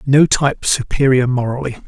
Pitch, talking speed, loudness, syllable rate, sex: 130 Hz, 130 wpm, -15 LUFS, 5.1 syllables/s, male